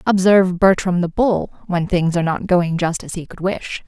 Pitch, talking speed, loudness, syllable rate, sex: 180 Hz, 215 wpm, -18 LUFS, 5.0 syllables/s, female